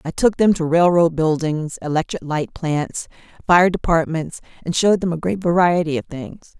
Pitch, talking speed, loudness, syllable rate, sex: 165 Hz, 175 wpm, -18 LUFS, 4.8 syllables/s, female